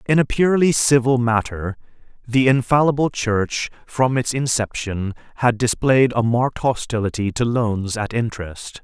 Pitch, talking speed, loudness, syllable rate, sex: 120 Hz, 135 wpm, -19 LUFS, 4.6 syllables/s, male